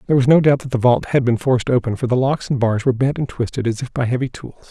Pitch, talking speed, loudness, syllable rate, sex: 125 Hz, 320 wpm, -18 LUFS, 6.8 syllables/s, male